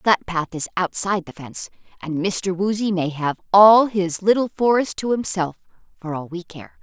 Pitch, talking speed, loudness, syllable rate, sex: 185 Hz, 185 wpm, -20 LUFS, 4.8 syllables/s, female